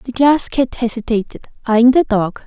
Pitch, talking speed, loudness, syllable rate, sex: 240 Hz, 170 wpm, -15 LUFS, 4.7 syllables/s, female